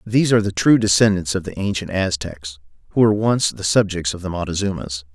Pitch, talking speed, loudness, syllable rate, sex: 95 Hz, 200 wpm, -19 LUFS, 6.1 syllables/s, male